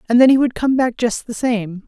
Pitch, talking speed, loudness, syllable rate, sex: 235 Hz, 290 wpm, -17 LUFS, 5.4 syllables/s, female